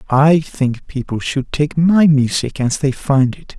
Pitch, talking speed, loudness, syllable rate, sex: 140 Hz, 185 wpm, -16 LUFS, 3.8 syllables/s, male